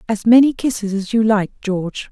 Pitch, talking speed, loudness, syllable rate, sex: 215 Hz, 200 wpm, -16 LUFS, 5.4 syllables/s, female